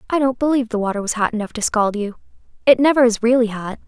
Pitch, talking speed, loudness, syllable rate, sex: 235 Hz, 250 wpm, -18 LUFS, 6.9 syllables/s, female